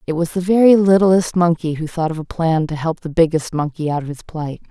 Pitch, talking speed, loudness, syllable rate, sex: 165 Hz, 255 wpm, -17 LUFS, 5.6 syllables/s, female